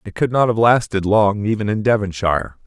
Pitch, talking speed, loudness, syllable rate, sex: 105 Hz, 205 wpm, -17 LUFS, 5.6 syllables/s, male